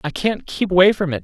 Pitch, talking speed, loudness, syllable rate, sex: 180 Hz, 290 wpm, -17 LUFS, 5.9 syllables/s, male